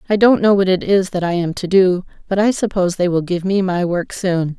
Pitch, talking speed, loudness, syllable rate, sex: 185 Hz, 275 wpm, -16 LUFS, 5.5 syllables/s, female